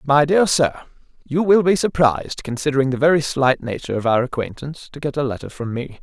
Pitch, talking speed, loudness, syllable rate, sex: 140 Hz, 200 wpm, -19 LUFS, 6.0 syllables/s, male